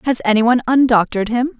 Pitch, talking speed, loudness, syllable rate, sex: 240 Hz, 190 wpm, -15 LUFS, 7.4 syllables/s, female